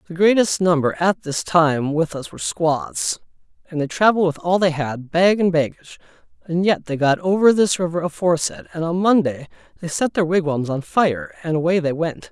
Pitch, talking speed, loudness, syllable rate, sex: 165 Hz, 200 wpm, -19 LUFS, 5.2 syllables/s, male